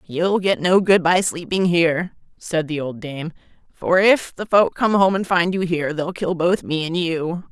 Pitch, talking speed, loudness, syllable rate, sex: 175 Hz, 215 wpm, -19 LUFS, 4.3 syllables/s, male